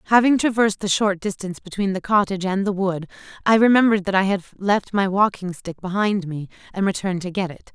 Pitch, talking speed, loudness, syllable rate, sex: 195 Hz, 210 wpm, -21 LUFS, 6.2 syllables/s, female